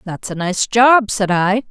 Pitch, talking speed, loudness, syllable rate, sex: 210 Hz, 210 wpm, -15 LUFS, 3.8 syllables/s, female